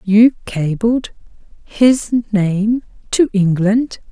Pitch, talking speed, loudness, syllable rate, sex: 215 Hz, 45 wpm, -15 LUFS, 3.9 syllables/s, female